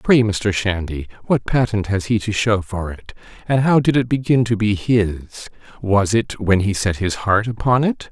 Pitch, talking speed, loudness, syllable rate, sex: 105 Hz, 205 wpm, -18 LUFS, 4.7 syllables/s, male